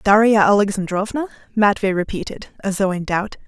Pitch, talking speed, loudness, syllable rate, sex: 200 Hz, 140 wpm, -19 LUFS, 5.4 syllables/s, female